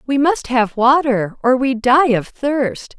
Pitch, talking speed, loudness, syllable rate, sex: 255 Hz, 180 wpm, -16 LUFS, 3.6 syllables/s, female